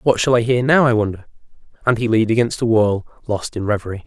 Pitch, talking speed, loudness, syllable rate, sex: 115 Hz, 235 wpm, -18 LUFS, 6.4 syllables/s, male